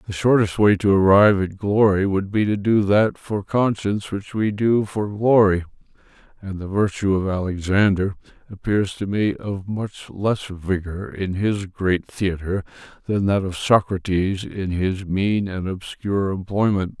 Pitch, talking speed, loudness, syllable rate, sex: 100 Hz, 160 wpm, -21 LUFS, 4.3 syllables/s, male